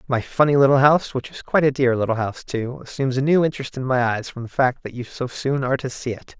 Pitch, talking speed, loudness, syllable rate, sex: 130 Hz, 280 wpm, -21 LUFS, 6.6 syllables/s, male